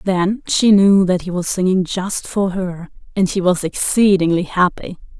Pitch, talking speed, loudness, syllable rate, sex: 185 Hz, 175 wpm, -16 LUFS, 4.3 syllables/s, female